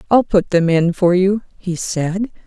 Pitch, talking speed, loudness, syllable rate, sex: 185 Hz, 195 wpm, -17 LUFS, 4.0 syllables/s, female